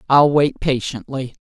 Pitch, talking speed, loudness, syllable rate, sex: 140 Hz, 125 wpm, -18 LUFS, 4.2 syllables/s, female